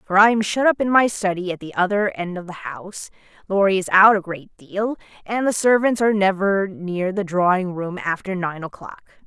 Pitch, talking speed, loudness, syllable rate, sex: 195 Hz, 205 wpm, -20 LUFS, 5.3 syllables/s, female